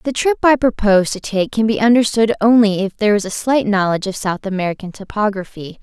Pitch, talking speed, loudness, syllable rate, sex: 210 Hz, 205 wpm, -16 LUFS, 6.1 syllables/s, female